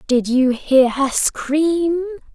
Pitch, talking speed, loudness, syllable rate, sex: 290 Hz, 130 wpm, -17 LUFS, 2.7 syllables/s, female